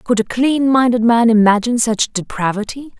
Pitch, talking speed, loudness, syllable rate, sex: 235 Hz, 160 wpm, -15 LUFS, 5.1 syllables/s, female